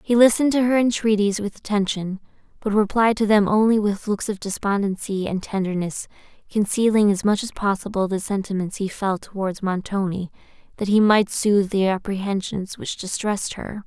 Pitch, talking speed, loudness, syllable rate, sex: 205 Hz, 165 wpm, -21 LUFS, 5.3 syllables/s, female